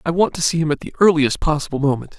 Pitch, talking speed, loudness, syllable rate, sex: 155 Hz, 275 wpm, -18 LUFS, 6.8 syllables/s, male